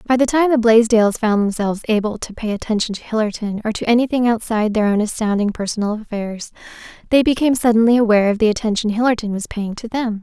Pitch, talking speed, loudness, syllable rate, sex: 220 Hz, 200 wpm, -17 LUFS, 6.5 syllables/s, female